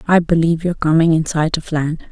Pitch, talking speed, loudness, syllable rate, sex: 160 Hz, 225 wpm, -16 LUFS, 6.5 syllables/s, female